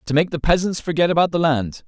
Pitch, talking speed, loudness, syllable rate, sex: 160 Hz, 255 wpm, -19 LUFS, 6.2 syllables/s, male